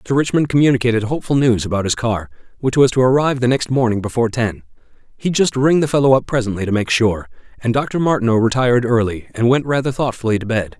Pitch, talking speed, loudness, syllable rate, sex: 120 Hz, 200 wpm, -17 LUFS, 6.6 syllables/s, male